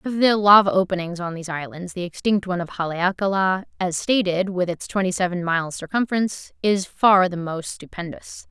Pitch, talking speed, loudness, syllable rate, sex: 185 Hz, 175 wpm, -21 LUFS, 5.5 syllables/s, female